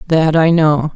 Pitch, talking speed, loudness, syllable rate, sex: 155 Hz, 190 wpm, -13 LUFS, 4.0 syllables/s, female